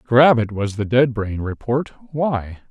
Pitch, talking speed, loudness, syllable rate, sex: 120 Hz, 180 wpm, -19 LUFS, 3.9 syllables/s, male